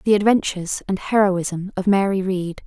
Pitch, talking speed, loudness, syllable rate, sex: 190 Hz, 155 wpm, -20 LUFS, 4.9 syllables/s, female